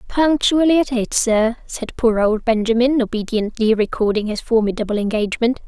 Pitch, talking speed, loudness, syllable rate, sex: 230 Hz, 135 wpm, -18 LUFS, 5.2 syllables/s, female